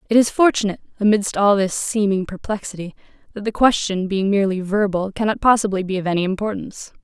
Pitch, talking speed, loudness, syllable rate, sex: 200 Hz, 170 wpm, -19 LUFS, 6.4 syllables/s, female